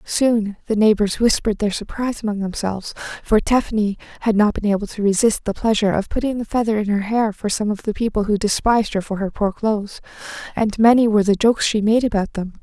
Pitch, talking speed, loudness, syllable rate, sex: 210 Hz, 220 wpm, -19 LUFS, 6.2 syllables/s, female